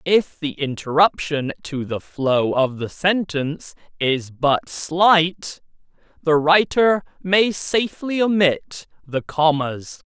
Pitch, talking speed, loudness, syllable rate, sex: 160 Hz, 115 wpm, -20 LUFS, 3.4 syllables/s, male